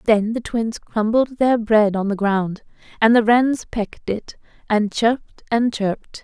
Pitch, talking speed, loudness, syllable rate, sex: 220 Hz, 175 wpm, -19 LUFS, 4.3 syllables/s, female